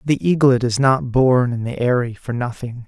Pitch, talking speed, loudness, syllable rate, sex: 125 Hz, 210 wpm, -18 LUFS, 4.7 syllables/s, male